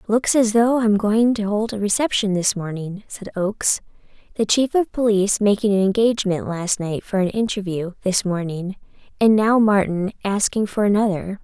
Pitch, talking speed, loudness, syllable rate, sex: 205 Hz, 180 wpm, -20 LUFS, 5.1 syllables/s, female